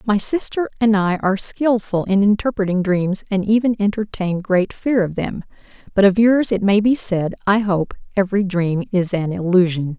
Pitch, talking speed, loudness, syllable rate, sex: 200 Hz, 180 wpm, -18 LUFS, 4.9 syllables/s, female